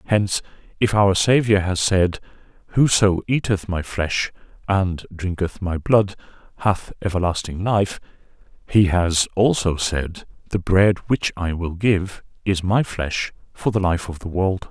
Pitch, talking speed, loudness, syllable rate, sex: 95 Hz, 145 wpm, -21 LUFS, 4.1 syllables/s, male